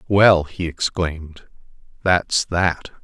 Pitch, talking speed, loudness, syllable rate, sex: 85 Hz, 100 wpm, -19 LUFS, 3.2 syllables/s, male